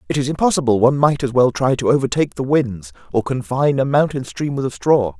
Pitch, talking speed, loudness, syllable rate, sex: 130 Hz, 230 wpm, -18 LUFS, 6.2 syllables/s, male